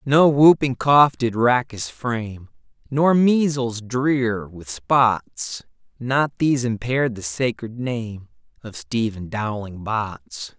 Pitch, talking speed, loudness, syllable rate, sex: 120 Hz, 125 wpm, -20 LUFS, 3.3 syllables/s, male